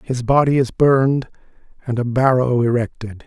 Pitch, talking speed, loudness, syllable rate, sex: 125 Hz, 145 wpm, -17 LUFS, 5.4 syllables/s, male